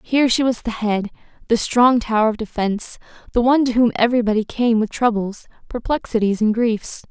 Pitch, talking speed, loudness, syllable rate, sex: 230 Hz, 175 wpm, -19 LUFS, 5.7 syllables/s, female